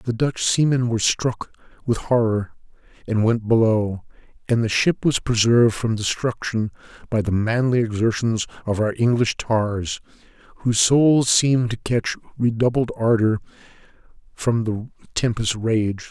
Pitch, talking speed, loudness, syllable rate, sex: 115 Hz, 135 wpm, -21 LUFS, 4.5 syllables/s, male